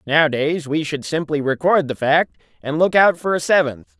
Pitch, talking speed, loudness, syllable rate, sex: 150 Hz, 195 wpm, -18 LUFS, 5.0 syllables/s, male